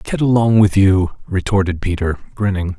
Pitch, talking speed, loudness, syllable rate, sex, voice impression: 95 Hz, 150 wpm, -16 LUFS, 5.1 syllables/s, male, very masculine, very adult-like, middle-aged, very thick, tensed, very soft, slightly muffled, fluent, slightly raspy, very cool, very intellectual, sincere, calm, very mature, friendly, reassuring, very wild, slightly sweet, lively, kind, slightly modest